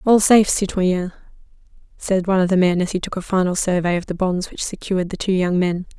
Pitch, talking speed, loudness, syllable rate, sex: 185 Hz, 230 wpm, -19 LUFS, 6.1 syllables/s, female